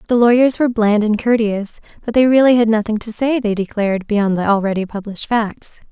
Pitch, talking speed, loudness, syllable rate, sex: 220 Hz, 205 wpm, -16 LUFS, 5.9 syllables/s, female